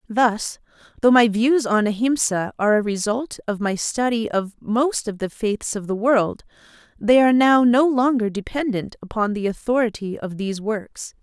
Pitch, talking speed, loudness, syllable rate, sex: 225 Hz, 170 wpm, -20 LUFS, 4.7 syllables/s, female